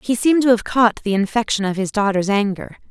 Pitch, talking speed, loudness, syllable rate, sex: 215 Hz, 225 wpm, -18 LUFS, 6.0 syllables/s, female